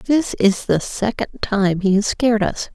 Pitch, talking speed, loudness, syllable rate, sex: 215 Hz, 195 wpm, -19 LUFS, 4.4 syllables/s, female